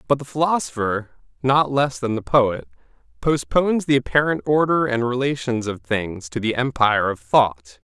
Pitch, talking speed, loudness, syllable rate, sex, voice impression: 125 Hz, 160 wpm, -20 LUFS, 4.8 syllables/s, male, masculine, adult-like, cool, intellectual, slightly refreshing, slightly friendly